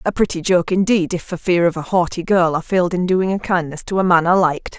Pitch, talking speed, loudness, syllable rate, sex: 175 Hz, 275 wpm, -17 LUFS, 6.0 syllables/s, female